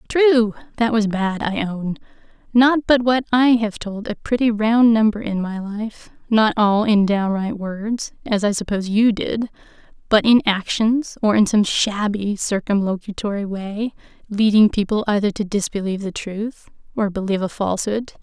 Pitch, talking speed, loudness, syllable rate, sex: 210 Hz, 160 wpm, -19 LUFS, 4.6 syllables/s, female